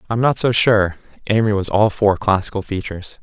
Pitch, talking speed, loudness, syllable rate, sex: 105 Hz, 185 wpm, -17 LUFS, 5.9 syllables/s, male